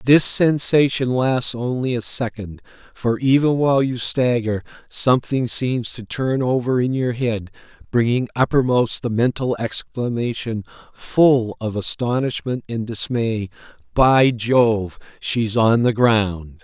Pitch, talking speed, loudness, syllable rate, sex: 120 Hz, 125 wpm, -19 LUFS, 3.9 syllables/s, male